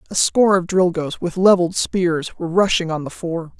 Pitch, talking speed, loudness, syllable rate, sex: 175 Hz, 200 wpm, -18 LUFS, 5.4 syllables/s, female